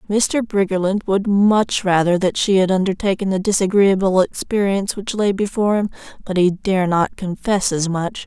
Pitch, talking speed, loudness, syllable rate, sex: 195 Hz, 165 wpm, -18 LUFS, 4.9 syllables/s, female